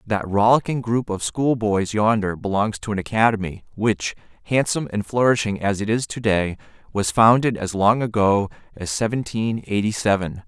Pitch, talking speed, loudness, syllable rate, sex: 105 Hz, 160 wpm, -21 LUFS, 5.0 syllables/s, male